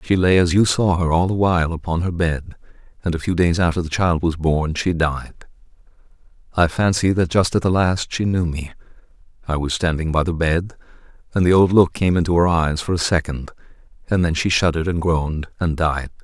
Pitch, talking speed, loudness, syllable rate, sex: 85 Hz, 215 wpm, -19 LUFS, 5.4 syllables/s, male